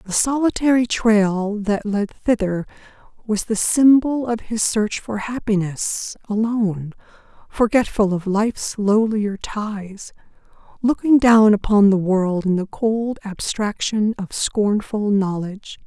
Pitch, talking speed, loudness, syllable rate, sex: 215 Hz, 115 wpm, -19 LUFS, 3.8 syllables/s, female